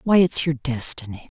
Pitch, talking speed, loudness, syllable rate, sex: 140 Hz, 175 wpm, -20 LUFS, 5.0 syllables/s, female